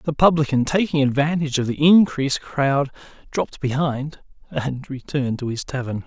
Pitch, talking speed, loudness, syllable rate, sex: 140 Hz, 150 wpm, -21 LUFS, 5.2 syllables/s, male